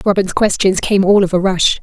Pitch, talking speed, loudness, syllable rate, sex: 190 Hz, 230 wpm, -13 LUFS, 5.2 syllables/s, female